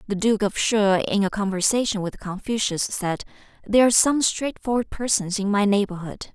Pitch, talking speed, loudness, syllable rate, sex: 210 Hz, 170 wpm, -22 LUFS, 5.2 syllables/s, female